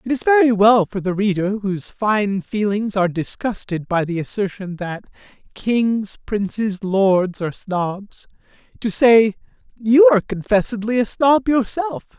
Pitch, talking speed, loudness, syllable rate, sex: 210 Hz, 145 wpm, -18 LUFS, 4.3 syllables/s, male